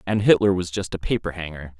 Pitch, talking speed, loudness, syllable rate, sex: 90 Hz, 235 wpm, -22 LUFS, 6.1 syllables/s, male